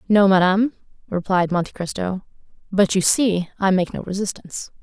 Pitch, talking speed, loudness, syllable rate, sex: 190 Hz, 150 wpm, -20 LUFS, 5.4 syllables/s, female